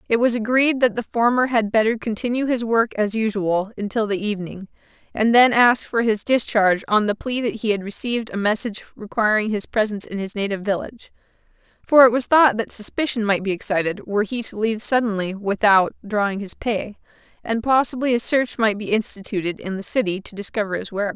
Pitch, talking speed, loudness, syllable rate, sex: 220 Hz, 200 wpm, -20 LUFS, 5.9 syllables/s, female